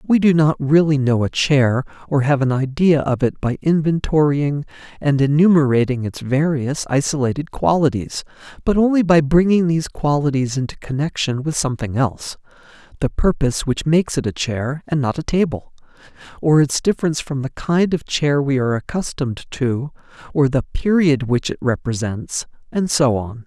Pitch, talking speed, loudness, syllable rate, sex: 145 Hz, 160 wpm, -18 LUFS, 5.1 syllables/s, male